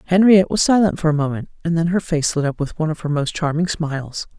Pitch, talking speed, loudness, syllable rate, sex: 160 Hz, 260 wpm, -18 LUFS, 6.5 syllables/s, female